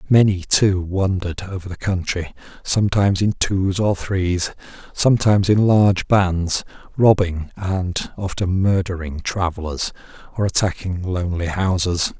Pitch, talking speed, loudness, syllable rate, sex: 95 Hz, 120 wpm, -19 LUFS, 4.5 syllables/s, male